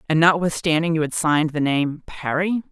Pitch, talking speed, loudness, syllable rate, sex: 160 Hz, 175 wpm, -20 LUFS, 5.3 syllables/s, female